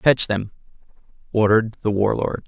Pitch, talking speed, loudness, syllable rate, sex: 110 Hz, 120 wpm, -20 LUFS, 4.9 syllables/s, male